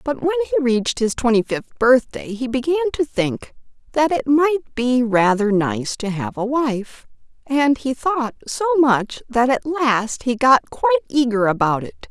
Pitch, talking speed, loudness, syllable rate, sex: 255 Hz, 180 wpm, -19 LUFS, 4.3 syllables/s, female